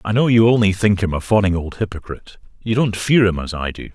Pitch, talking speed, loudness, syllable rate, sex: 100 Hz, 245 wpm, -17 LUFS, 6.1 syllables/s, male